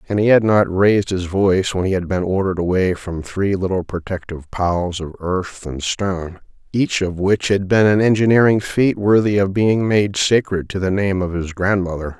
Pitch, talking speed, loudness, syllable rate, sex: 95 Hz, 200 wpm, -18 LUFS, 5.1 syllables/s, male